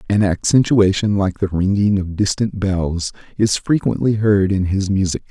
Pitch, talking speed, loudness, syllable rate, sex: 100 Hz, 160 wpm, -17 LUFS, 4.6 syllables/s, male